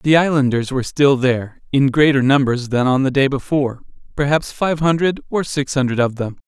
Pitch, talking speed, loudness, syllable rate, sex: 135 Hz, 195 wpm, -17 LUFS, 5.5 syllables/s, male